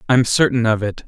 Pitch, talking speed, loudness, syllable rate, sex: 120 Hz, 225 wpm, -17 LUFS, 5.6 syllables/s, male